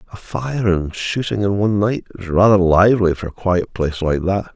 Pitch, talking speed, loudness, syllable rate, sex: 95 Hz, 210 wpm, -17 LUFS, 5.3 syllables/s, male